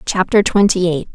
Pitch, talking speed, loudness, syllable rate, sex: 185 Hz, 160 wpm, -14 LUFS, 5.0 syllables/s, female